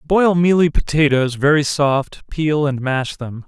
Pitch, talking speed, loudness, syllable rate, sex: 150 Hz, 155 wpm, -17 LUFS, 4.0 syllables/s, male